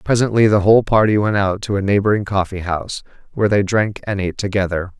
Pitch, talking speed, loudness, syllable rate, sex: 100 Hz, 205 wpm, -17 LUFS, 6.4 syllables/s, male